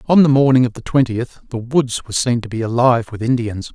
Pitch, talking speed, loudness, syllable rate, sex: 120 Hz, 240 wpm, -17 LUFS, 6.1 syllables/s, male